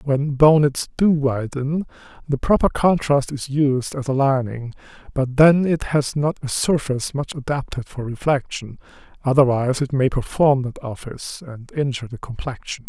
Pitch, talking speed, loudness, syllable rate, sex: 135 Hz, 155 wpm, -20 LUFS, 4.7 syllables/s, male